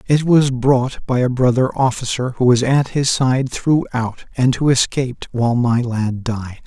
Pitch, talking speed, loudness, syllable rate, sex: 125 Hz, 180 wpm, -17 LUFS, 4.6 syllables/s, male